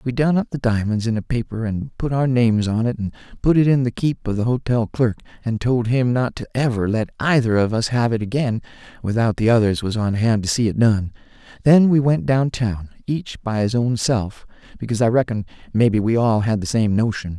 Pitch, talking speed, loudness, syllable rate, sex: 115 Hz, 230 wpm, -20 LUFS, 5.5 syllables/s, male